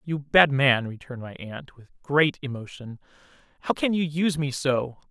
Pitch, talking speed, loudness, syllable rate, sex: 140 Hz, 175 wpm, -24 LUFS, 4.9 syllables/s, male